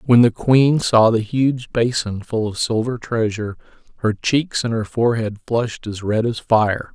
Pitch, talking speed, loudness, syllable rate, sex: 115 Hz, 180 wpm, -19 LUFS, 4.5 syllables/s, male